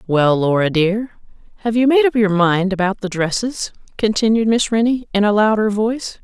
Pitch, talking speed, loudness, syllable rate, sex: 210 Hz, 185 wpm, -17 LUFS, 5.1 syllables/s, female